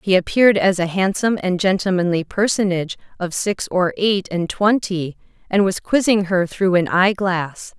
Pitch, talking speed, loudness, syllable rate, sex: 190 Hz, 170 wpm, -18 LUFS, 4.8 syllables/s, female